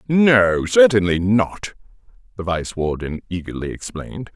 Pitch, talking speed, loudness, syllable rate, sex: 100 Hz, 110 wpm, -18 LUFS, 4.4 syllables/s, male